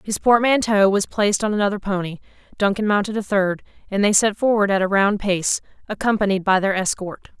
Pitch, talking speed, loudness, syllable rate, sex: 200 Hz, 185 wpm, -19 LUFS, 5.7 syllables/s, female